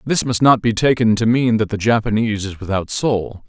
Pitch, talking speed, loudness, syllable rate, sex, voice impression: 110 Hz, 225 wpm, -17 LUFS, 5.4 syllables/s, male, very masculine, very adult-like, very middle-aged, very thick, tensed, powerful, bright, hard, clear, very fluent, very cool, very intellectual, refreshing, very sincere, very calm, very mature, very friendly, very reassuring, unique, elegant, very wild, sweet, very lively, very kind